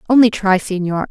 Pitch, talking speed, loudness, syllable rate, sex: 200 Hz, 165 wpm, -15 LUFS, 6.9 syllables/s, female